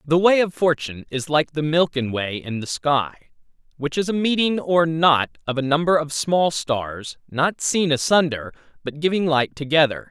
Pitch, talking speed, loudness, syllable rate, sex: 150 Hz, 185 wpm, -21 LUFS, 4.7 syllables/s, male